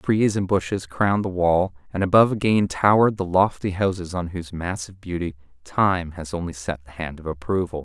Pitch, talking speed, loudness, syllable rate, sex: 90 Hz, 190 wpm, -22 LUFS, 5.6 syllables/s, male